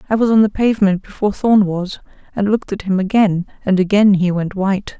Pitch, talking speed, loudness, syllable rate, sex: 200 Hz, 215 wpm, -16 LUFS, 6.1 syllables/s, female